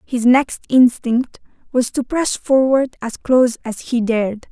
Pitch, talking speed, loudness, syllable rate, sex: 250 Hz, 160 wpm, -17 LUFS, 4.1 syllables/s, female